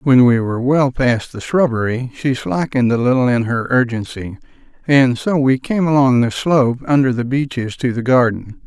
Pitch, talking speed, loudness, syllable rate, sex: 125 Hz, 185 wpm, -16 LUFS, 5.0 syllables/s, male